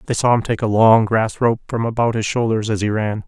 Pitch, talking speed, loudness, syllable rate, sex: 110 Hz, 275 wpm, -17 LUFS, 5.7 syllables/s, male